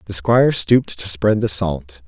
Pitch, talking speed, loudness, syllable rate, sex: 95 Hz, 200 wpm, -17 LUFS, 4.7 syllables/s, male